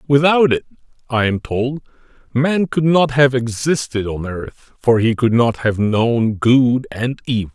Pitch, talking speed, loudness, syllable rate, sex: 125 Hz, 165 wpm, -17 LUFS, 4.0 syllables/s, male